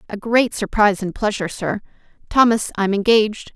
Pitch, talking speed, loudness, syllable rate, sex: 210 Hz, 150 wpm, -18 LUFS, 5.6 syllables/s, female